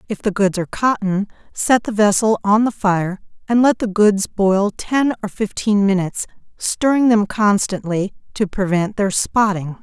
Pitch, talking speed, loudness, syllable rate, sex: 205 Hz, 165 wpm, -18 LUFS, 4.5 syllables/s, female